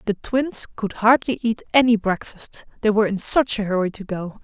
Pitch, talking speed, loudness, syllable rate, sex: 215 Hz, 205 wpm, -20 LUFS, 5.1 syllables/s, female